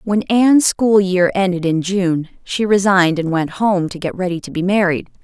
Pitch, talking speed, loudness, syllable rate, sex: 190 Hz, 205 wpm, -16 LUFS, 4.9 syllables/s, female